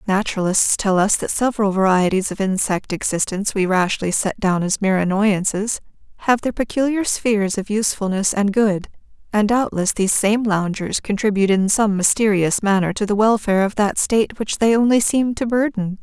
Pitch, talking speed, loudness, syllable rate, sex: 205 Hz, 170 wpm, -18 LUFS, 5.4 syllables/s, female